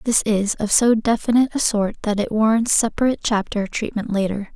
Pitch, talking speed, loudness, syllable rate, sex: 220 Hz, 185 wpm, -19 LUFS, 5.7 syllables/s, female